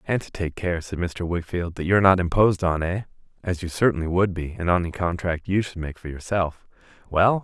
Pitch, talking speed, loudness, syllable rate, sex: 90 Hz, 220 wpm, -24 LUFS, 5.6 syllables/s, male